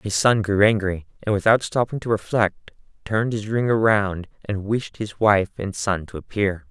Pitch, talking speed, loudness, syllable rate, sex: 105 Hz, 190 wpm, -21 LUFS, 4.5 syllables/s, male